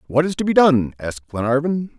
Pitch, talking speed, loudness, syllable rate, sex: 145 Hz, 210 wpm, -18 LUFS, 6.0 syllables/s, male